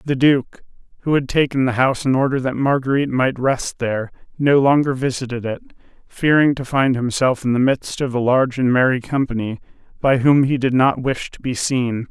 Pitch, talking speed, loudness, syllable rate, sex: 130 Hz, 200 wpm, -18 LUFS, 5.4 syllables/s, male